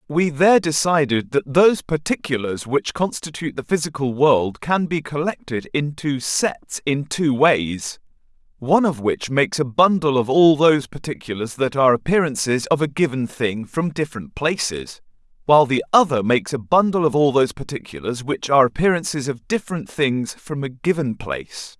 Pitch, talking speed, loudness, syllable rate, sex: 145 Hz, 160 wpm, -20 LUFS, 5.2 syllables/s, male